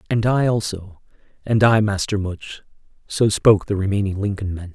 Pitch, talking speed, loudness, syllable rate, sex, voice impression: 100 Hz, 150 wpm, -19 LUFS, 5.2 syllables/s, male, very masculine, adult-like, slightly dark, cool, intellectual, calm